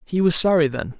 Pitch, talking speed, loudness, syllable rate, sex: 165 Hz, 240 wpm, -18 LUFS, 5.6 syllables/s, male